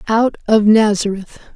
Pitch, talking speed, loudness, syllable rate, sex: 215 Hz, 115 wpm, -14 LUFS, 4.5 syllables/s, female